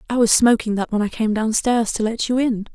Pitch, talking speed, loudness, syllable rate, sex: 225 Hz, 265 wpm, -19 LUFS, 5.6 syllables/s, female